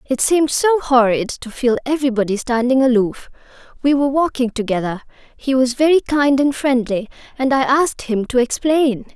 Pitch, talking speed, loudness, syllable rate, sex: 260 Hz, 145 wpm, -17 LUFS, 5.4 syllables/s, female